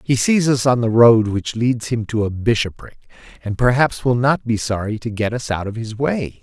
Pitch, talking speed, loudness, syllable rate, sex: 115 Hz, 235 wpm, -18 LUFS, 5.0 syllables/s, male